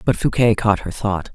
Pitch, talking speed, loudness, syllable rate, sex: 105 Hz, 225 wpm, -19 LUFS, 4.8 syllables/s, female